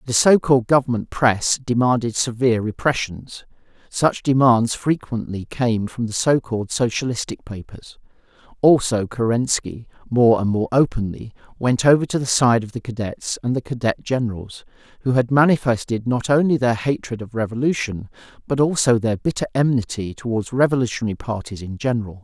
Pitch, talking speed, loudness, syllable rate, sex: 120 Hz, 145 wpm, -20 LUFS, 5.3 syllables/s, male